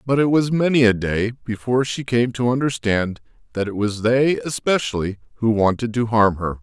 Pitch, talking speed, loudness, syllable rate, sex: 115 Hz, 190 wpm, -20 LUFS, 5.1 syllables/s, male